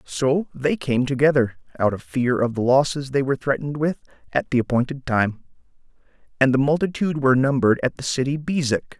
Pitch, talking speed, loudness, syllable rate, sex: 135 Hz, 180 wpm, -21 LUFS, 6.0 syllables/s, male